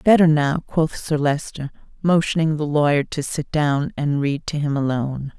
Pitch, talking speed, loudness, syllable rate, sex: 150 Hz, 180 wpm, -20 LUFS, 4.8 syllables/s, female